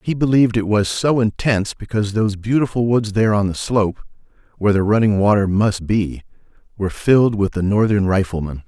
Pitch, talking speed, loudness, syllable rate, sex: 105 Hz, 180 wpm, -18 LUFS, 6.0 syllables/s, male